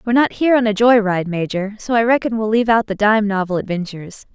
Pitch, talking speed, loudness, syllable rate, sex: 215 Hz, 250 wpm, -17 LUFS, 6.5 syllables/s, female